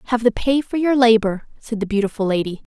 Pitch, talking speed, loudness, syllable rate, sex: 225 Hz, 215 wpm, -19 LUFS, 6.1 syllables/s, female